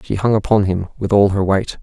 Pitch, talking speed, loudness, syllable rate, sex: 100 Hz, 265 wpm, -16 LUFS, 5.6 syllables/s, male